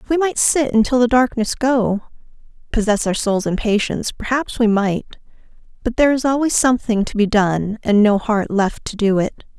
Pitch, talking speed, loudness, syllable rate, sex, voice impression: 225 Hz, 195 wpm, -17 LUFS, 5.1 syllables/s, female, very feminine, very middle-aged, very thin, tensed, slightly relaxed, powerful, slightly dark, soft, clear, fluent, cute, very cool, very intellectual, slightly refreshing, sincere, very calm, very friendly, reassuring, unique, elegant, slightly wild, slightly sweet, slightly lively, kind, modest, very light